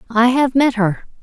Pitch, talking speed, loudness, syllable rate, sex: 240 Hz, 195 wpm, -16 LUFS, 4.6 syllables/s, female